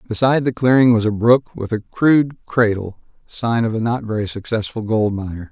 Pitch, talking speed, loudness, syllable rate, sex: 115 Hz, 185 wpm, -18 LUFS, 5.4 syllables/s, male